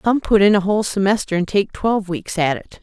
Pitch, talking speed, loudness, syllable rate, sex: 195 Hz, 255 wpm, -18 LUFS, 5.9 syllables/s, female